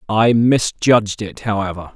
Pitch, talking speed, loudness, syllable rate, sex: 110 Hz, 125 wpm, -17 LUFS, 4.5 syllables/s, male